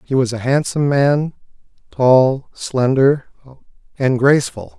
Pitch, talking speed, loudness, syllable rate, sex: 135 Hz, 115 wpm, -16 LUFS, 4.1 syllables/s, male